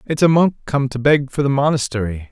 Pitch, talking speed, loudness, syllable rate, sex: 135 Hz, 235 wpm, -17 LUFS, 5.7 syllables/s, male